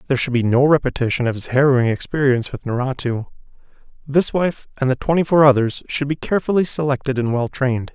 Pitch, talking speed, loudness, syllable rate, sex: 135 Hz, 190 wpm, -18 LUFS, 6.4 syllables/s, male